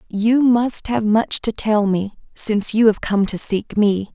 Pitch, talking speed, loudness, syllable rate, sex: 215 Hz, 205 wpm, -18 LUFS, 4.0 syllables/s, female